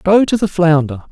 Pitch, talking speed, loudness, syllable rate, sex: 175 Hz, 215 wpm, -14 LUFS, 4.9 syllables/s, male